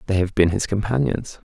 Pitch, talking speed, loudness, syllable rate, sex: 100 Hz, 200 wpm, -21 LUFS, 5.6 syllables/s, male